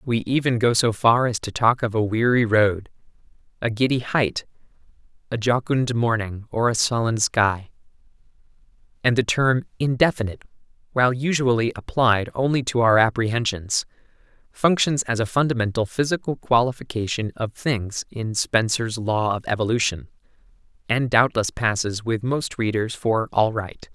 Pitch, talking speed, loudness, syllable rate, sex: 115 Hz, 140 wpm, -22 LUFS, 4.8 syllables/s, male